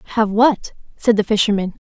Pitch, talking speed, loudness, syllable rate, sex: 215 Hz, 160 wpm, -17 LUFS, 5.8 syllables/s, female